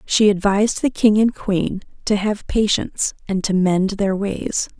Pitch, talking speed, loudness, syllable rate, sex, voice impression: 200 Hz, 175 wpm, -19 LUFS, 4.2 syllables/s, female, feminine, adult-like, slightly fluent, slightly cute, slightly sincere, slightly calm, slightly kind